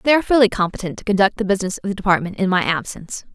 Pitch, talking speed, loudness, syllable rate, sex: 200 Hz, 250 wpm, -19 LUFS, 8.0 syllables/s, female